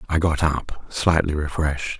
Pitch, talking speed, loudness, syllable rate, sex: 80 Hz, 150 wpm, -22 LUFS, 4.5 syllables/s, male